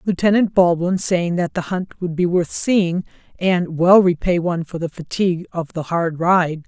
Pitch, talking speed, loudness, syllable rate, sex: 175 Hz, 190 wpm, -18 LUFS, 4.6 syllables/s, female